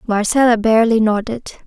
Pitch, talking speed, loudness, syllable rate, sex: 225 Hz, 110 wpm, -14 LUFS, 5.8 syllables/s, female